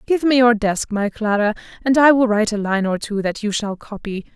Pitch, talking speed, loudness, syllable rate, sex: 220 Hz, 250 wpm, -18 LUFS, 5.4 syllables/s, female